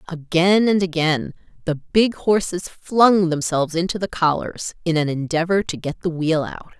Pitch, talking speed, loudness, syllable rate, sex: 170 Hz, 170 wpm, -20 LUFS, 4.5 syllables/s, female